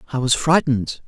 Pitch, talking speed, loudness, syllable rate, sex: 135 Hz, 165 wpm, -18 LUFS, 6.3 syllables/s, male